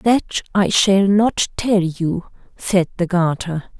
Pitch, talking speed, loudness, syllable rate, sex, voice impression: 185 Hz, 140 wpm, -18 LUFS, 3.4 syllables/s, female, feminine, adult-like, relaxed, slightly bright, soft, raspy, calm, slightly friendly, elegant, slightly kind, modest